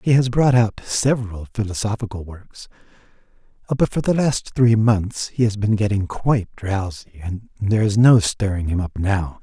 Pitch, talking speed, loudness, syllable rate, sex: 105 Hz, 170 wpm, -20 LUFS, 4.8 syllables/s, male